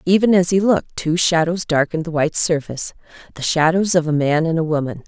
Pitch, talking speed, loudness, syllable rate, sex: 165 Hz, 200 wpm, -18 LUFS, 6.3 syllables/s, female